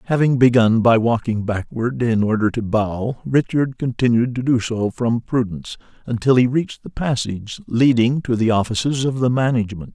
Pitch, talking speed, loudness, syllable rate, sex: 120 Hz, 170 wpm, -19 LUFS, 5.2 syllables/s, male